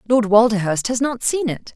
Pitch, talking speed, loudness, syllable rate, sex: 230 Hz, 205 wpm, -18 LUFS, 5.1 syllables/s, female